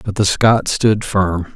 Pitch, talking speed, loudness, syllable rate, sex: 105 Hz, 195 wpm, -15 LUFS, 3.5 syllables/s, male